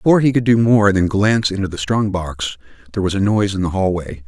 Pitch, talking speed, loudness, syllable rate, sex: 100 Hz, 265 wpm, -17 LUFS, 7.1 syllables/s, male